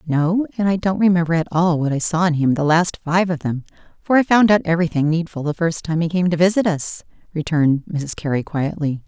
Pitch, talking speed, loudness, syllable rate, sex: 165 Hz, 230 wpm, -18 LUFS, 5.7 syllables/s, female